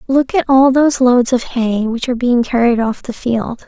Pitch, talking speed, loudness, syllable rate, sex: 250 Hz, 230 wpm, -14 LUFS, 4.9 syllables/s, female